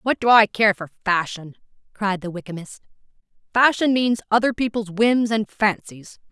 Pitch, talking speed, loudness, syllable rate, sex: 210 Hz, 150 wpm, -20 LUFS, 4.9 syllables/s, female